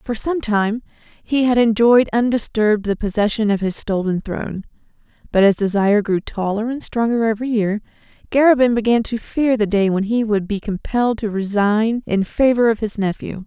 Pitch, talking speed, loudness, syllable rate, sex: 220 Hz, 180 wpm, -18 LUFS, 5.2 syllables/s, female